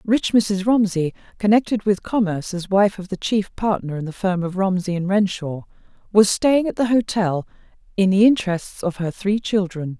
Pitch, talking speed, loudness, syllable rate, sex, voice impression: 195 Hz, 185 wpm, -20 LUFS, 4.9 syllables/s, female, feminine, very adult-like, slightly clear, intellectual, slightly calm, slightly sharp